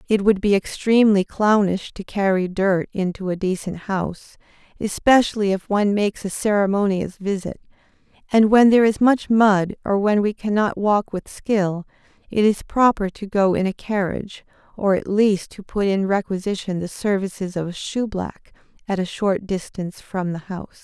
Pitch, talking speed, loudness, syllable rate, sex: 200 Hz, 175 wpm, -20 LUFS, 5.0 syllables/s, female